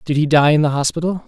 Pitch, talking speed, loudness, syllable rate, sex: 155 Hz, 280 wpm, -16 LUFS, 6.8 syllables/s, male